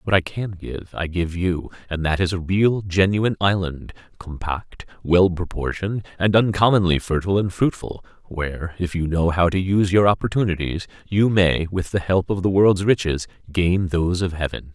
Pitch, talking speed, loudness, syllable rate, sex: 90 Hz, 180 wpm, -21 LUFS, 5.1 syllables/s, male